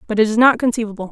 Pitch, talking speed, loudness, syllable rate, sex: 225 Hz, 270 wpm, -16 LUFS, 8.4 syllables/s, female